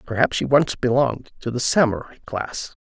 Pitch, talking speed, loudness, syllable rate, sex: 125 Hz, 170 wpm, -21 LUFS, 5.3 syllables/s, male